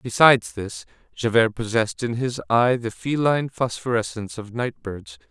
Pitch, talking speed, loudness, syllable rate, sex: 120 Hz, 145 wpm, -22 LUFS, 5.0 syllables/s, male